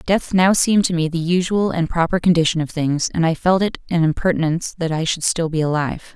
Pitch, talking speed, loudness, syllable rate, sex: 170 Hz, 235 wpm, -18 LUFS, 6.0 syllables/s, female